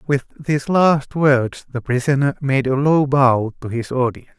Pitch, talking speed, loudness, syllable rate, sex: 135 Hz, 180 wpm, -18 LUFS, 4.7 syllables/s, male